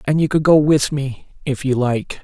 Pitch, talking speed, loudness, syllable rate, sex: 140 Hz, 240 wpm, -17 LUFS, 4.5 syllables/s, male